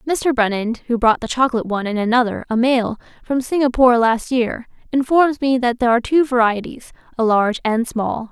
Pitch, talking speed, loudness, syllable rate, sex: 240 Hz, 190 wpm, -18 LUFS, 5.8 syllables/s, female